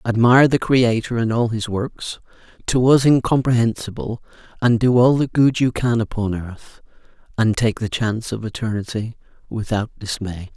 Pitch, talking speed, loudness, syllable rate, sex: 115 Hz, 155 wpm, -19 LUFS, 4.8 syllables/s, male